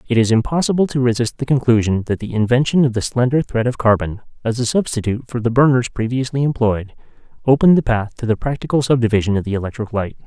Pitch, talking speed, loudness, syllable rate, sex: 120 Hz, 205 wpm, -17 LUFS, 6.6 syllables/s, male